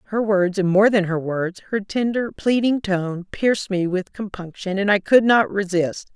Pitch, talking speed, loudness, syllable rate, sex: 200 Hz, 195 wpm, -20 LUFS, 4.5 syllables/s, female